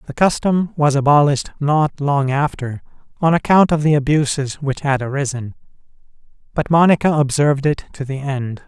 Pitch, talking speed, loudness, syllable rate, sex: 145 Hz, 150 wpm, -17 LUFS, 5.2 syllables/s, male